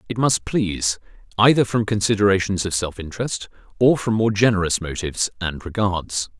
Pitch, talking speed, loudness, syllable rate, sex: 100 Hz, 150 wpm, -20 LUFS, 5.4 syllables/s, male